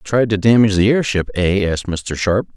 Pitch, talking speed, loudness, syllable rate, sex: 100 Hz, 210 wpm, -16 LUFS, 5.4 syllables/s, male